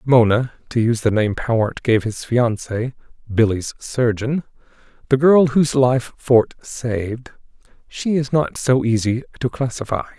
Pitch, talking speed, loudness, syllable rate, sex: 120 Hz, 125 wpm, -19 LUFS, 4.6 syllables/s, male